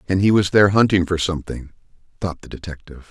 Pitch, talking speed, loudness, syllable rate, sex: 90 Hz, 195 wpm, -18 LUFS, 7.0 syllables/s, male